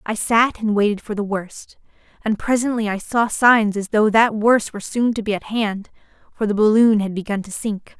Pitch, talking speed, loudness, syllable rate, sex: 215 Hz, 220 wpm, -19 LUFS, 5.0 syllables/s, female